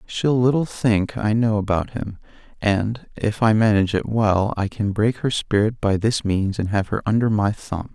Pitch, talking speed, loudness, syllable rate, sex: 105 Hz, 205 wpm, -21 LUFS, 4.6 syllables/s, male